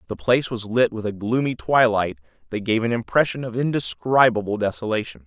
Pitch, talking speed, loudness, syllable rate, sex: 115 Hz, 170 wpm, -21 LUFS, 5.7 syllables/s, male